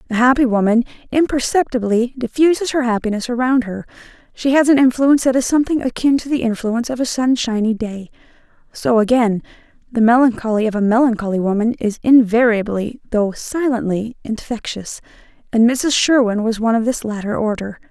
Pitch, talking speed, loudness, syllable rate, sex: 235 Hz, 155 wpm, -17 LUFS, 5.7 syllables/s, female